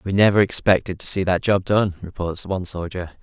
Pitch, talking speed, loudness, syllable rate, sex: 95 Hz, 205 wpm, -20 LUFS, 5.6 syllables/s, male